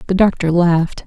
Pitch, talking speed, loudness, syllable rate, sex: 175 Hz, 170 wpm, -15 LUFS, 5.6 syllables/s, female